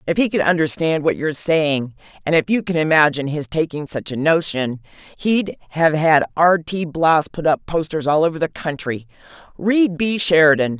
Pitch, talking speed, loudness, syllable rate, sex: 160 Hz, 180 wpm, -18 LUFS, 5.0 syllables/s, female